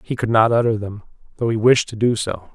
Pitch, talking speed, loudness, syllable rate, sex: 110 Hz, 260 wpm, -18 LUFS, 5.8 syllables/s, male